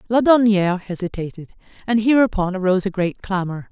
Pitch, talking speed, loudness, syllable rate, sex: 200 Hz, 130 wpm, -19 LUFS, 6.1 syllables/s, female